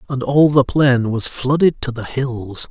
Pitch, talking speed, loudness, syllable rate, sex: 130 Hz, 200 wpm, -17 LUFS, 4.0 syllables/s, male